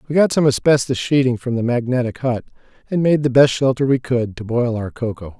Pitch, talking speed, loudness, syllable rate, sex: 125 Hz, 225 wpm, -18 LUFS, 5.7 syllables/s, male